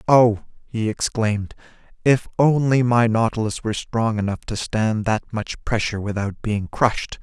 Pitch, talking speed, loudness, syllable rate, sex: 110 Hz, 150 wpm, -21 LUFS, 4.7 syllables/s, male